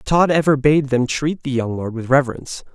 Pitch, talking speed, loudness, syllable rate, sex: 135 Hz, 220 wpm, -18 LUFS, 5.5 syllables/s, male